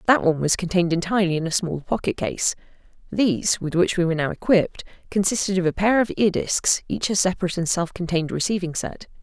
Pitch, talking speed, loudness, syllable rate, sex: 180 Hz, 200 wpm, -22 LUFS, 6.4 syllables/s, female